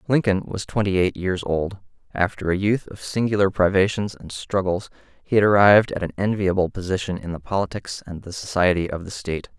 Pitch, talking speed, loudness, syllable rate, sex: 95 Hz, 190 wpm, -22 LUFS, 5.7 syllables/s, male